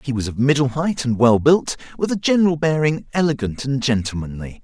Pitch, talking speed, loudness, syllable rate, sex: 135 Hz, 195 wpm, -19 LUFS, 5.7 syllables/s, male